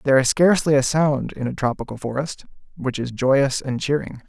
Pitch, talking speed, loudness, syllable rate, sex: 135 Hz, 195 wpm, -21 LUFS, 5.5 syllables/s, male